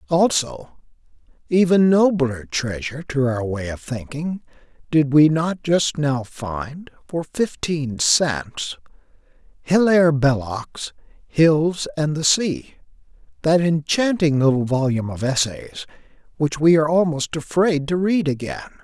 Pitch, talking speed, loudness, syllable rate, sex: 155 Hz, 120 wpm, -20 LUFS, 4.0 syllables/s, male